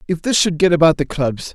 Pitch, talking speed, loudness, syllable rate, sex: 165 Hz, 270 wpm, -16 LUFS, 5.8 syllables/s, male